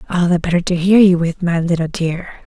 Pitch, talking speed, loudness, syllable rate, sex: 175 Hz, 235 wpm, -15 LUFS, 5.3 syllables/s, female